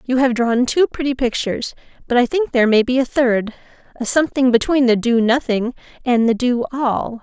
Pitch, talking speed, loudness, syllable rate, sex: 250 Hz, 190 wpm, -17 LUFS, 5.3 syllables/s, female